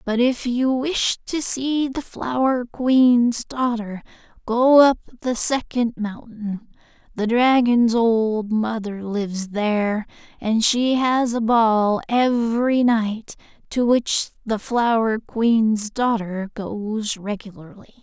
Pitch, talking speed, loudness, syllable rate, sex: 230 Hz, 120 wpm, -20 LUFS, 3.2 syllables/s, female